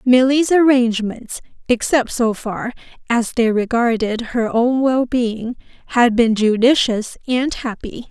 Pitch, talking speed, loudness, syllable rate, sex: 240 Hz, 120 wpm, -17 LUFS, 4.0 syllables/s, female